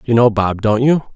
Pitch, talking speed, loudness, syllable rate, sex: 115 Hz, 260 wpm, -15 LUFS, 5.2 syllables/s, male